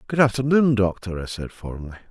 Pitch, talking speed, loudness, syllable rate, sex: 110 Hz, 170 wpm, -21 LUFS, 6.0 syllables/s, male